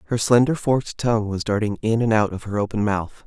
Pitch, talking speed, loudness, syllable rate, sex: 110 Hz, 240 wpm, -21 LUFS, 6.0 syllables/s, male